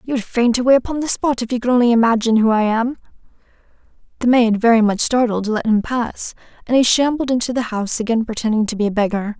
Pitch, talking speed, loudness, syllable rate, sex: 235 Hz, 225 wpm, -17 LUFS, 6.5 syllables/s, female